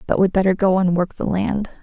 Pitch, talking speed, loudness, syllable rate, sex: 190 Hz, 265 wpm, -19 LUFS, 5.6 syllables/s, female